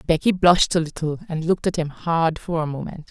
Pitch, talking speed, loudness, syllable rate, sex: 165 Hz, 230 wpm, -21 LUFS, 6.0 syllables/s, female